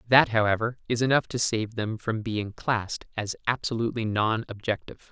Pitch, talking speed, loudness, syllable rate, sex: 110 Hz, 165 wpm, -27 LUFS, 5.4 syllables/s, male